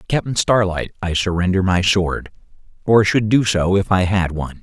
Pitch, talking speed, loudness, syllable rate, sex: 95 Hz, 170 wpm, -17 LUFS, 5.0 syllables/s, male